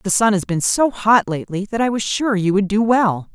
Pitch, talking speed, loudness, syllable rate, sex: 205 Hz, 270 wpm, -17 LUFS, 5.3 syllables/s, female